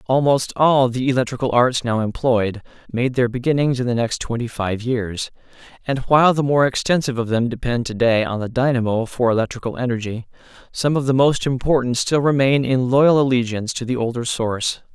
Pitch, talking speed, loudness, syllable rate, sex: 125 Hz, 185 wpm, -19 LUFS, 5.5 syllables/s, male